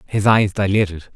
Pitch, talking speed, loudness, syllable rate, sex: 100 Hz, 155 wpm, -17 LUFS, 4.9 syllables/s, male